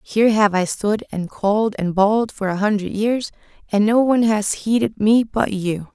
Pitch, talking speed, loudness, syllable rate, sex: 210 Hz, 200 wpm, -19 LUFS, 4.8 syllables/s, female